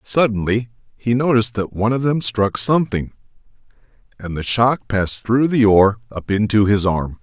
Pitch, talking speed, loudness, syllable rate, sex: 110 Hz, 165 wpm, -18 LUFS, 5.1 syllables/s, male